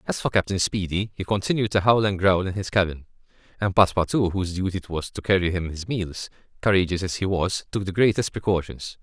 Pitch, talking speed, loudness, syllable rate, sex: 95 Hz, 215 wpm, -23 LUFS, 6.0 syllables/s, male